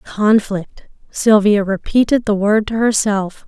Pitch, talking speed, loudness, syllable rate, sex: 210 Hz, 120 wpm, -15 LUFS, 3.8 syllables/s, female